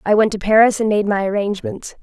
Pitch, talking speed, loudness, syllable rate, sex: 210 Hz, 235 wpm, -16 LUFS, 6.4 syllables/s, female